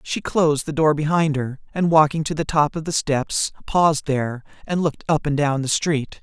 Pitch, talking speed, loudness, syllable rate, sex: 150 Hz, 220 wpm, -20 LUFS, 5.2 syllables/s, male